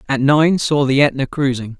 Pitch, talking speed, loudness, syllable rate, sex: 140 Hz, 200 wpm, -16 LUFS, 5.0 syllables/s, male